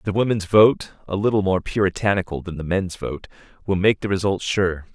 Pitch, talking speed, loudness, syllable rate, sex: 95 Hz, 195 wpm, -21 LUFS, 5.4 syllables/s, male